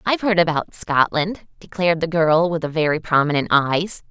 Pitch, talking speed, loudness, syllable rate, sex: 165 Hz, 175 wpm, -19 LUFS, 5.3 syllables/s, female